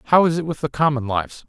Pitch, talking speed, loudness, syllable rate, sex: 145 Hz, 285 wpm, -20 LUFS, 6.3 syllables/s, male